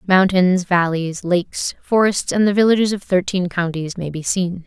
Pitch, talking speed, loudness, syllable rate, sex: 185 Hz, 165 wpm, -18 LUFS, 4.7 syllables/s, female